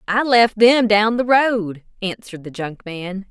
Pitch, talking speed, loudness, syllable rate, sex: 210 Hz, 180 wpm, -17 LUFS, 4.0 syllables/s, female